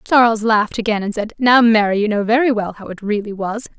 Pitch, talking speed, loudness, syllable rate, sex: 220 Hz, 240 wpm, -16 LUFS, 5.9 syllables/s, female